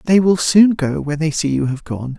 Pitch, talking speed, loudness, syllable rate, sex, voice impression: 150 Hz, 275 wpm, -16 LUFS, 4.9 syllables/s, male, very masculine, slightly old, very thick, slightly tensed, weak, slightly dark, soft, slightly muffled, fluent, raspy, cool, very intellectual, slightly refreshing, very sincere, very calm, very mature, friendly, reassuring, very unique, elegant, slightly wild, slightly sweet, lively, kind, slightly intense, slightly modest